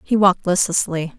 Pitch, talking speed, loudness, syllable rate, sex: 175 Hz, 150 wpm, -18 LUFS, 5.6 syllables/s, female